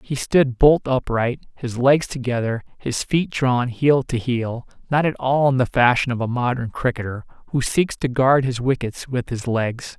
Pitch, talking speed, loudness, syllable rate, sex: 125 Hz, 190 wpm, -20 LUFS, 4.4 syllables/s, male